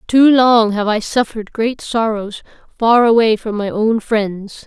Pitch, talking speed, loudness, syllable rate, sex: 225 Hz, 165 wpm, -15 LUFS, 4.1 syllables/s, female